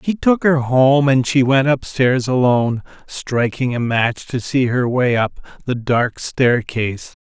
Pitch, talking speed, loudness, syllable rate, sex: 130 Hz, 165 wpm, -17 LUFS, 3.9 syllables/s, male